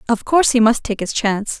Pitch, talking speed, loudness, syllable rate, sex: 225 Hz, 265 wpm, -16 LUFS, 6.4 syllables/s, female